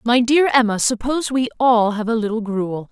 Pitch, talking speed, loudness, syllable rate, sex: 230 Hz, 205 wpm, -18 LUFS, 5.2 syllables/s, female